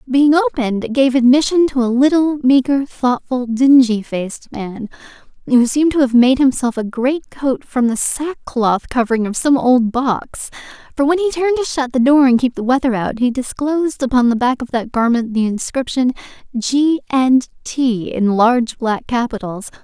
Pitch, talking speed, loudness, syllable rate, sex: 255 Hz, 180 wpm, -16 LUFS, 4.9 syllables/s, female